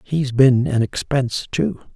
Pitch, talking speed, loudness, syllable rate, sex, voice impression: 130 Hz, 155 wpm, -19 LUFS, 4.2 syllables/s, male, very masculine, old, very thick, very relaxed, slightly weak, very dark, soft, very muffled, slightly fluent, very raspy, very cool, intellectual, sincere, very calm, very mature, friendly, slightly reassuring, very unique, slightly elegant, very wild, slightly sweet, slightly lively, kind, very modest